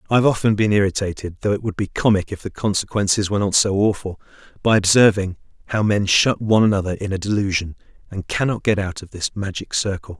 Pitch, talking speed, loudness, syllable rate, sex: 100 Hz, 205 wpm, -19 LUFS, 6.2 syllables/s, male